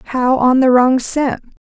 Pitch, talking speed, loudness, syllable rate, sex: 260 Hz, 185 wpm, -14 LUFS, 3.6 syllables/s, female